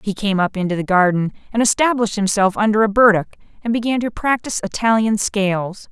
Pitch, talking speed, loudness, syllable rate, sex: 210 Hz, 185 wpm, -17 LUFS, 6.1 syllables/s, female